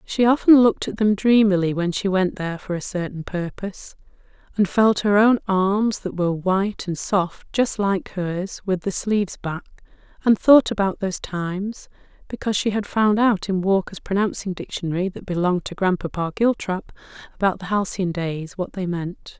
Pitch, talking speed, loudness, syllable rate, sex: 195 Hz, 175 wpm, -21 LUFS, 5.1 syllables/s, female